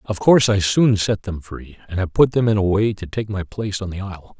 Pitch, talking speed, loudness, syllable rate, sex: 100 Hz, 285 wpm, -19 LUFS, 5.7 syllables/s, male